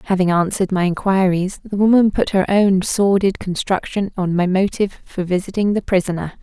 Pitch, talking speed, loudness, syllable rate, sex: 190 Hz, 170 wpm, -18 LUFS, 5.4 syllables/s, female